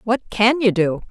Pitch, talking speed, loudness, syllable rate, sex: 215 Hz, 215 wpm, -18 LUFS, 4.3 syllables/s, female